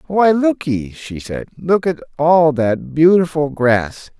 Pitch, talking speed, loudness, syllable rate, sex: 150 Hz, 145 wpm, -16 LUFS, 3.5 syllables/s, male